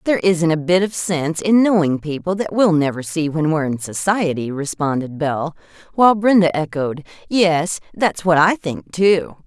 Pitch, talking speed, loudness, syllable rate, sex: 170 Hz, 175 wpm, -18 LUFS, 5.0 syllables/s, female